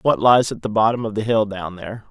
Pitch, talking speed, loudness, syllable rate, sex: 110 Hz, 285 wpm, -19 LUFS, 5.9 syllables/s, male